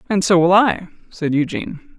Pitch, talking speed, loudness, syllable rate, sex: 180 Hz, 180 wpm, -17 LUFS, 5.6 syllables/s, female